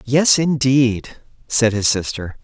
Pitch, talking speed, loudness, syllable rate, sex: 125 Hz, 125 wpm, -16 LUFS, 3.4 syllables/s, male